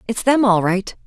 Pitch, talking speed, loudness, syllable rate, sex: 215 Hz, 225 wpm, -17 LUFS, 4.8 syllables/s, female